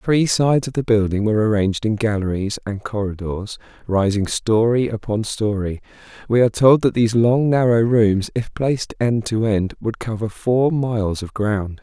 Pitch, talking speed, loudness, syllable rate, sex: 110 Hz, 175 wpm, -19 LUFS, 4.9 syllables/s, male